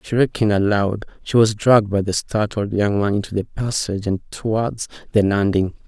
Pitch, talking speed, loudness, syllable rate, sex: 105 Hz, 175 wpm, -19 LUFS, 5.0 syllables/s, male